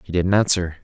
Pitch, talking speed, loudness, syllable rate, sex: 90 Hz, 215 wpm, -19 LUFS, 5.6 syllables/s, male